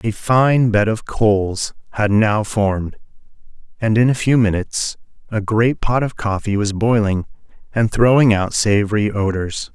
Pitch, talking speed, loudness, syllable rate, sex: 110 Hz, 155 wpm, -17 LUFS, 4.4 syllables/s, male